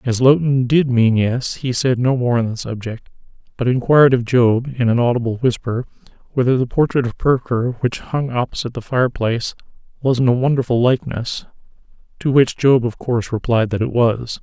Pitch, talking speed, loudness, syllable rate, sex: 125 Hz, 180 wpm, -17 LUFS, 5.4 syllables/s, male